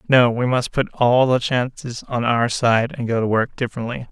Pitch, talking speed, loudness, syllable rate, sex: 120 Hz, 220 wpm, -19 LUFS, 4.9 syllables/s, male